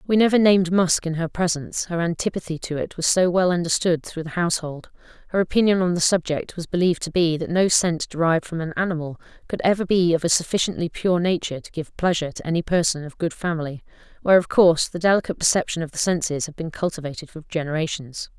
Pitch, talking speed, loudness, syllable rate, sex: 170 Hz, 210 wpm, -22 LUFS, 6.5 syllables/s, female